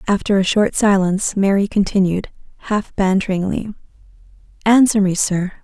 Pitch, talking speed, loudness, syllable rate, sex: 200 Hz, 115 wpm, -17 LUFS, 5.1 syllables/s, female